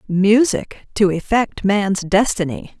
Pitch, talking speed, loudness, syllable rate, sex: 200 Hz, 105 wpm, -17 LUFS, 3.6 syllables/s, female